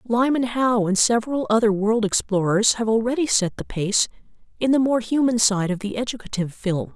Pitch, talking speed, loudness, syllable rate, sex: 225 Hz, 180 wpm, -21 LUFS, 5.5 syllables/s, female